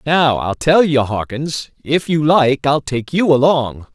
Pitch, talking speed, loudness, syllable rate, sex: 140 Hz, 180 wpm, -15 LUFS, 3.8 syllables/s, male